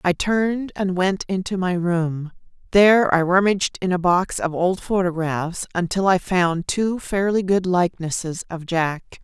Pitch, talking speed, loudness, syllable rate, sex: 180 Hz, 160 wpm, -20 LUFS, 4.4 syllables/s, female